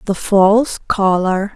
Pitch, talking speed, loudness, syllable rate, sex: 200 Hz, 115 wpm, -14 LUFS, 3.6 syllables/s, female